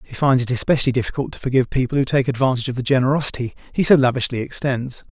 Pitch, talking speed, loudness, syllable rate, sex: 130 Hz, 210 wpm, -19 LUFS, 7.5 syllables/s, male